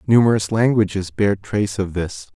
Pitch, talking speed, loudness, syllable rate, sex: 100 Hz, 150 wpm, -19 LUFS, 5.1 syllables/s, male